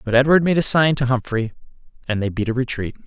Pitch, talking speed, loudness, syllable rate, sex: 125 Hz, 235 wpm, -19 LUFS, 6.4 syllables/s, male